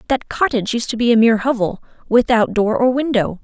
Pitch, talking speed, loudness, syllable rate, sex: 235 Hz, 210 wpm, -16 LUFS, 6.0 syllables/s, female